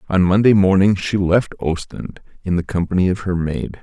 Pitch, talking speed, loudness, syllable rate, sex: 90 Hz, 190 wpm, -17 LUFS, 5.1 syllables/s, male